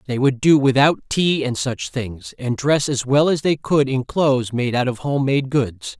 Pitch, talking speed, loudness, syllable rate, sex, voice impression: 135 Hz, 230 wpm, -19 LUFS, 4.4 syllables/s, male, masculine, adult-like, slightly fluent, refreshing, slightly sincere, slightly unique